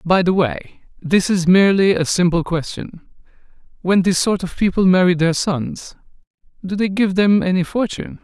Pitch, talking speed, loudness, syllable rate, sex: 185 Hz, 170 wpm, -17 LUFS, 4.9 syllables/s, male